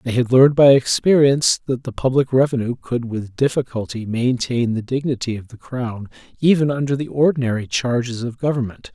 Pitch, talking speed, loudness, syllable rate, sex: 125 Hz, 170 wpm, -18 LUFS, 5.5 syllables/s, male